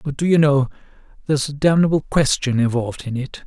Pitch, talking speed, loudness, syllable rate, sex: 140 Hz, 190 wpm, -19 LUFS, 6.1 syllables/s, male